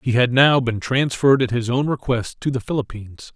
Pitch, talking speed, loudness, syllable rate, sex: 125 Hz, 215 wpm, -19 LUFS, 5.5 syllables/s, male